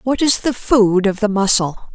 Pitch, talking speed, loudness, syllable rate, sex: 215 Hz, 215 wpm, -15 LUFS, 4.4 syllables/s, female